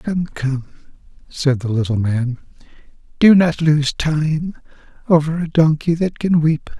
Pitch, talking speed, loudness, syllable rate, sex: 155 Hz, 140 wpm, -17 LUFS, 4.0 syllables/s, male